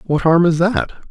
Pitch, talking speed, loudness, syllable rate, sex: 165 Hz, 220 wpm, -15 LUFS, 4.0 syllables/s, male